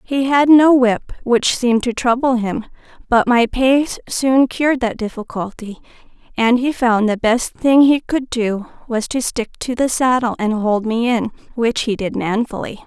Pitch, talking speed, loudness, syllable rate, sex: 240 Hz, 180 wpm, -17 LUFS, 4.3 syllables/s, female